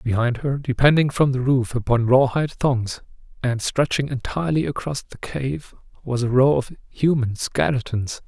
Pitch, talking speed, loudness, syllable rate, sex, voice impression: 130 Hz, 150 wpm, -21 LUFS, 4.8 syllables/s, male, masculine, middle-aged, relaxed, slightly muffled, slightly raspy, slightly sincere, calm, friendly, reassuring, wild, kind, modest